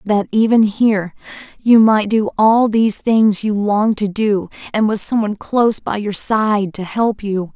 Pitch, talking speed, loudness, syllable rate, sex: 210 Hz, 190 wpm, -16 LUFS, 4.4 syllables/s, female